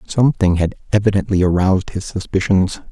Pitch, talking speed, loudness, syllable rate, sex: 95 Hz, 125 wpm, -17 LUFS, 5.9 syllables/s, male